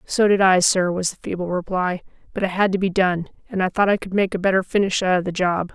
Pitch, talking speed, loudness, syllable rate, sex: 185 Hz, 280 wpm, -20 LUFS, 6.0 syllables/s, female